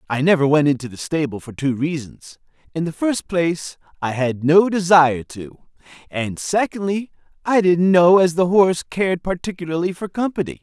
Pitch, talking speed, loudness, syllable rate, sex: 165 Hz, 170 wpm, -19 LUFS, 5.2 syllables/s, male